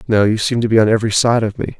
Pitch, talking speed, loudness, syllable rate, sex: 110 Hz, 335 wpm, -15 LUFS, 7.4 syllables/s, male